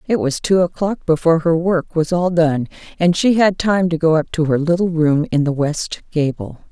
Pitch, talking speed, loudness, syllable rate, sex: 165 Hz, 225 wpm, -17 LUFS, 4.9 syllables/s, female